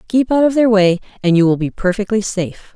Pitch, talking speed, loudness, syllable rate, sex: 205 Hz, 240 wpm, -15 LUFS, 6.3 syllables/s, female